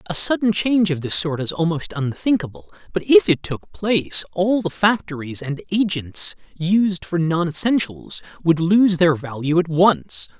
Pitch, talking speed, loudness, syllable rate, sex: 170 Hz, 165 wpm, -19 LUFS, 4.5 syllables/s, male